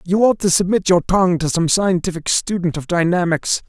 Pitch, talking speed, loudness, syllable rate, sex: 180 Hz, 195 wpm, -17 LUFS, 5.4 syllables/s, male